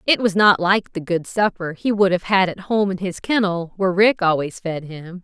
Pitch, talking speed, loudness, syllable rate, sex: 190 Hz, 240 wpm, -19 LUFS, 4.9 syllables/s, female